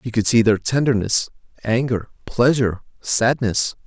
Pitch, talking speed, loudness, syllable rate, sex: 115 Hz, 125 wpm, -19 LUFS, 5.0 syllables/s, male